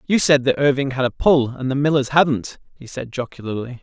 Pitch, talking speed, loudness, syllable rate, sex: 135 Hz, 220 wpm, -19 LUFS, 5.4 syllables/s, male